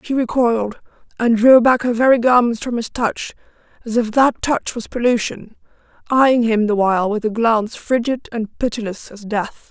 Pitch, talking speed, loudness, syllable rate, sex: 230 Hz, 180 wpm, -17 LUFS, 4.9 syllables/s, female